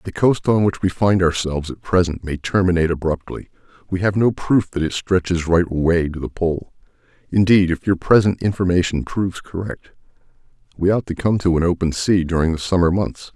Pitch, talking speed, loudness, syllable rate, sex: 90 Hz, 195 wpm, -19 LUFS, 5.5 syllables/s, male